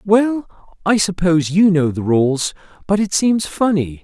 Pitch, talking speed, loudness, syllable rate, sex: 180 Hz, 165 wpm, -17 LUFS, 4.0 syllables/s, male